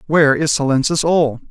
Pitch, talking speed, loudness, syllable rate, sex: 150 Hz, 160 wpm, -15 LUFS, 5.5 syllables/s, male